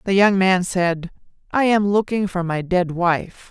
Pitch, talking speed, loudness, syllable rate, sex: 185 Hz, 190 wpm, -19 LUFS, 4.0 syllables/s, female